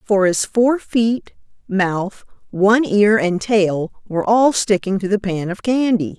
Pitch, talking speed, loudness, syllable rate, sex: 205 Hz, 165 wpm, -17 LUFS, 3.9 syllables/s, female